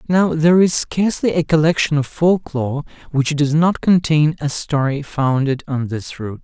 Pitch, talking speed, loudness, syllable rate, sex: 150 Hz, 175 wpm, -17 LUFS, 4.6 syllables/s, male